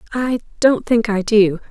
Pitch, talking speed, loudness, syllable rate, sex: 220 Hz, 175 wpm, -17 LUFS, 4.4 syllables/s, female